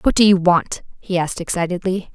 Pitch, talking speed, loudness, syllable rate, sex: 180 Hz, 195 wpm, -18 LUFS, 5.6 syllables/s, female